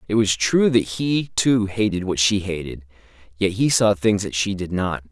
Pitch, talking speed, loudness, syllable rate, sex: 100 Hz, 210 wpm, -20 LUFS, 4.6 syllables/s, male